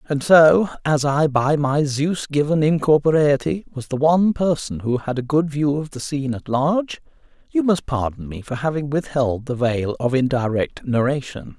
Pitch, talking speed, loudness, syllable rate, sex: 140 Hz, 180 wpm, -20 LUFS, 4.7 syllables/s, male